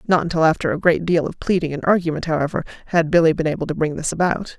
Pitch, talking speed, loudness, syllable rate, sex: 165 Hz, 250 wpm, -19 LUFS, 7.0 syllables/s, female